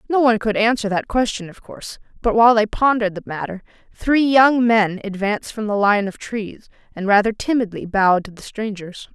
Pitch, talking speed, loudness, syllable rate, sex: 215 Hz, 195 wpm, -18 LUFS, 5.6 syllables/s, female